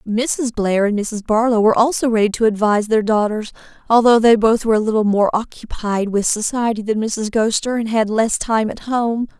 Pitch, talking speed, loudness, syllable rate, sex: 220 Hz, 200 wpm, -17 LUFS, 5.3 syllables/s, female